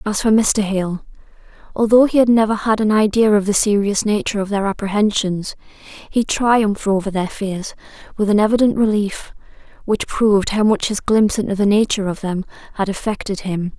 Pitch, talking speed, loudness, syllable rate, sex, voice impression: 205 Hz, 180 wpm, -17 LUFS, 5.3 syllables/s, female, very feminine, slightly young, slightly adult-like, very thin, very relaxed, very weak, slightly dark, soft, slightly muffled, fluent, slightly raspy, very cute, intellectual, slightly refreshing, sincere, very calm, friendly, reassuring, unique, elegant, sweet, slightly lively, kind, slightly modest